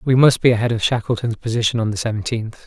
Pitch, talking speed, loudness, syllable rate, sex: 115 Hz, 225 wpm, -18 LUFS, 6.6 syllables/s, male